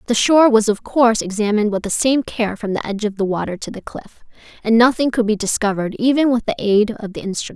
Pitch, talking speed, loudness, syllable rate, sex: 220 Hz, 245 wpm, -17 LUFS, 6.5 syllables/s, female